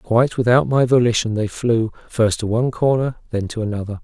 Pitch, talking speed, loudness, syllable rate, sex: 115 Hz, 195 wpm, -19 LUFS, 5.7 syllables/s, male